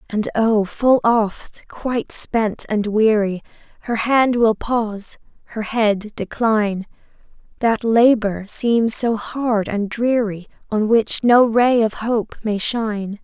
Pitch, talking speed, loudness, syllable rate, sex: 220 Hz, 135 wpm, -18 LUFS, 3.5 syllables/s, female